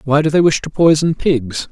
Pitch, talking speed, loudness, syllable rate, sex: 150 Hz, 245 wpm, -14 LUFS, 5.0 syllables/s, male